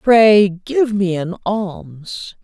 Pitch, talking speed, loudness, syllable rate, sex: 180 Hz, 125 wpm, -15 LUFS, 2.3 syllables/s, male